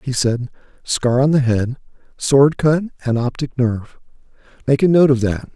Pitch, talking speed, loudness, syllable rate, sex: 130 Hz, 160 wpm, -17 LUFS, 4.7 syllables/s, male